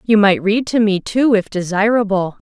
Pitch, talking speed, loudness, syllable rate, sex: 205 Hz, 195 wpm, -16 LUFS, 4.7 syllables/s, female